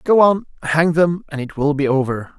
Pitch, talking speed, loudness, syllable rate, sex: 155 Hz, 225 wpm, -18 LUFS, 5.0 syllables/s, male